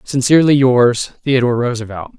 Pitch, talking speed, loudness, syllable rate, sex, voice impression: 125 Hz, 110 wpm, -14 LUFS, 5.6 syllables/s, male, masculine, adult-like, tensed, clear, fluent, slightly nasal, cool, intellectual, sincere, friendly, reassuring, wild, lively, slightly kind